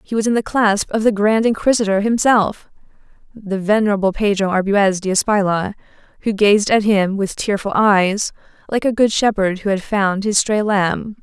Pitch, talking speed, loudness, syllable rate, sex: 205 Hz, 170 wpm, -17 LUFS, 4.7 syllables/s, female